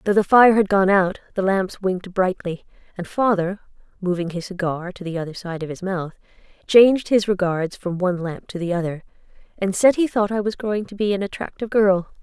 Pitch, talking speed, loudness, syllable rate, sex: 190 Hz, 210 wpm, -21 LUFS, 5.6 syllables/s, female